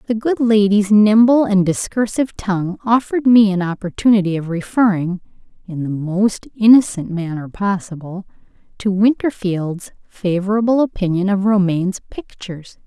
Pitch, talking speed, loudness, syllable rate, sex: 200 Hz, 120 wpm, -16 LUFS, 4.9 syllables/s, female